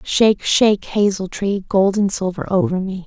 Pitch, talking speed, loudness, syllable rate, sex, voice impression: 195 Hz, 175 wpm, -18 LUFS, 4.8 syllables/s, female, feminine, adult-like, relaxed, weak, soft, calm, friendly, reassuring, kind, modest